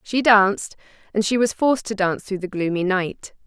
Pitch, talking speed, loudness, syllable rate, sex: 205 Hz, 210 wpm, -20 LUFS, 5.5 syllables/s, female